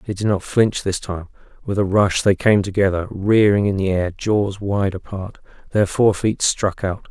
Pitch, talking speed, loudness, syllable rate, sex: 100 Hz, 205 wpm, -19 LUFS, 4.5 syllables/s, male